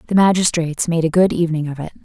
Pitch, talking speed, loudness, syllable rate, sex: 170 Hz, 235 wpm, -17 LUFS, 7.5 syllables/s, female